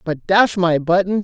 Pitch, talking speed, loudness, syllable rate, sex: 180 Hz, 195 wpm, -16 LUFS, 4.2 syllables/s, male